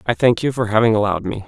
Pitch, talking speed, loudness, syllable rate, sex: 110 Hz, 285 wpm, -17 LUFS, 7.4 syllables/s, male